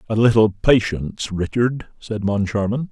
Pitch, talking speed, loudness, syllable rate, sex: 110 Hz, 125 wpm, -19 LUFS, 4.6 syllables/s, male